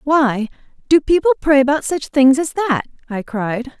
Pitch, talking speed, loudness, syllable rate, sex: 280 Hz, 175 wpm, -16 LUFS, 4.3 syllables/s, female